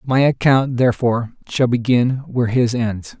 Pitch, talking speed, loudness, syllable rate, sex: 120 Hz, 150 wpm, -17 LUFS, 4.8 syllables/s, male